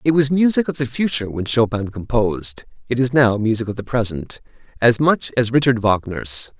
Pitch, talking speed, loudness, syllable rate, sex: 120 Hz, 190 wpm, -18 LUFS, 5.3 syllables/s, male